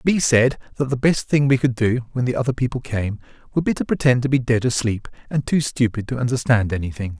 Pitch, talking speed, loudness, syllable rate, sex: 125 Hz, 235 wpm, -20 LUFS, 5.9 syllables/s, male